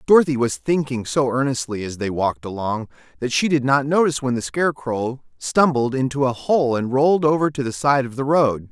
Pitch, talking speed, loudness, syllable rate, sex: 135 Hz, 205 wpm, -20 LUFS, 5.5 syllables/s, male